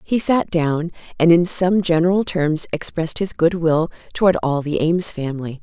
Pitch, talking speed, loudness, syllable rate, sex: 165 Hz, 180 wpm, -19 LUFS, 5.1 syllables/s, female